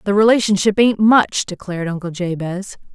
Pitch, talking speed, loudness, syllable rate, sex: 195 Hz, 145 wpm, -16 LUFS, 5.2 syllables/s, female